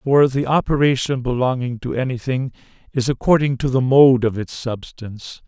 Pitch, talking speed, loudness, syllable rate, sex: 130 Hz, 155 wpm, -18 LUFS, 5.1 syllables/s, male